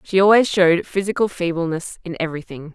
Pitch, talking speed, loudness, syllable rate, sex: 175 Hz, 155 wpm, -18 LUFS, 6.1 syllables/s, female